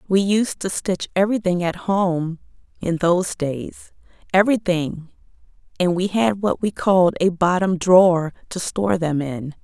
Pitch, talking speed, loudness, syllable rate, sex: 180 Hz, 145 wpm, -20 LUFS, 4.5 syllables/s, female